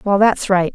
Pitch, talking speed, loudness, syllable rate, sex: 195 Hz, 240 wpm, -16 LUFS, 4.6 syllables/s, female